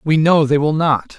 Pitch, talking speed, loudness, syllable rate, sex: 155 Hz, 255 wpm, -15 LUFS, 4.4 syllables/s, male